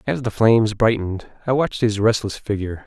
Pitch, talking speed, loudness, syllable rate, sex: 110 Hz, 190 wpm, -20 LUFS, 6.2 syllables/s, male